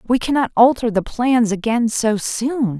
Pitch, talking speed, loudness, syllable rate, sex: 235 Hz, 170 wpm, -17 LUFS, 4.3 syllables/s, female